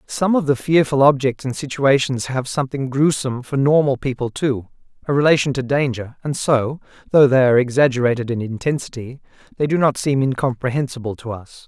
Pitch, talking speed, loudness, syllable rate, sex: 135 Hz, 170 wpm, -18 LUFS, 5.6 syllables/s, male